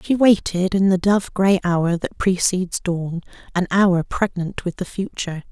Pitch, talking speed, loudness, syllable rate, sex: 185 Hz, 165 wpm, -20 LUFS, 4.4 syllables/s, female